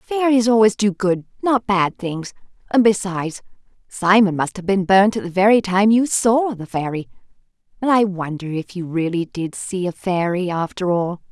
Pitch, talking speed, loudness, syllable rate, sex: 195 Hz, 180 wpm, -19 LUFS, 4.7 syllables/s, female